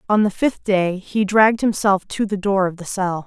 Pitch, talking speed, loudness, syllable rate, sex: 200 Hz, 240 wpm, -19 LUFS, 4.9 syllables/s, female